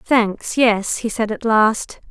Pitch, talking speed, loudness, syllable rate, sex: 220 Hz, 170 wpm, -18 LUFS, 3.1 syllables/s, female